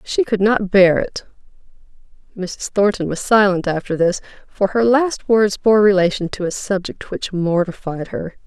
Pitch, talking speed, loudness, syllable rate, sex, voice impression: 195 Hz, 165 wpm, -17 LUFS, 4.5 syllables/s, female, feminine, middle-aged, slightly bright, clear, fluent, calm, reassuring, elegant, slightly sharp